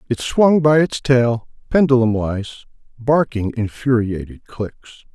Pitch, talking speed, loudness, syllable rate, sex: 120 Hz, 115 wpm, -18 LUFS, 4.2 syllables/s, male